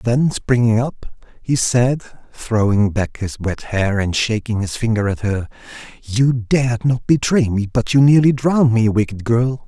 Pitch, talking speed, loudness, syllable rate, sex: 115 Hz, 175 wpm, -17 LUFS, 4.4 syllables/s, male